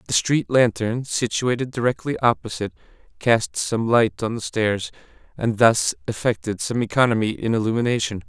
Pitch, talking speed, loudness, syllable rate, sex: 115 Hz, 140 wpm, -21 LUFS, 5.1 syllables/s, male